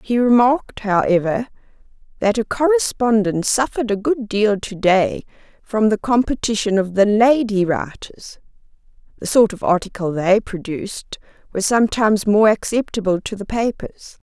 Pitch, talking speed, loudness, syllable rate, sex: 215 Hz, 135 wpm, -18 LUFS, 4.9 syllables/s, female